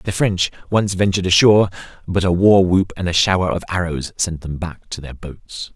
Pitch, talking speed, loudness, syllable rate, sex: 90 Hz, 210 wpm, -17 LUFS, 5.2 syllables/s, male